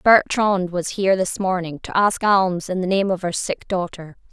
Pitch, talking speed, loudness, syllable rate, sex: 185 Hz, 210 wpm, -20 LUFS, 4.8 syllables/s, female